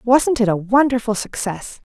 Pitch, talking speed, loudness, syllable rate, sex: 230 Hz, 155 wpm, -18 LUFS, 4.5 syllables/s, female